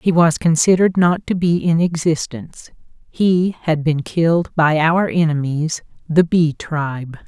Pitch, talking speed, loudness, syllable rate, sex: 165 Hz, 140 wpm, -17 LUFS, 4.4 syllables/s, female